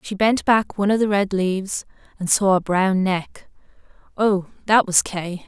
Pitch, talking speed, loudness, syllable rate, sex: 195 Hz, 185 wpm, -20 LUFS, 4.5 syllables/s, female